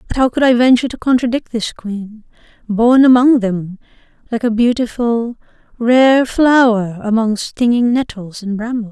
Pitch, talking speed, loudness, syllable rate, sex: 235 Hz, 150 wpm, -14 LUFS, 4.6 syllables/s, female